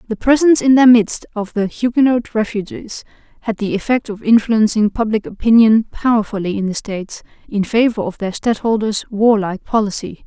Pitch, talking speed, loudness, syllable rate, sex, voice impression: 220 Hz, 160 wpm, -16 LUFS, 5.4 syllables/s, female, feminine, adult-like, tensed, powerful, slightly hard, fluent, slightly raspy, intellectual, calm, lively, slightly strict, slightly sharp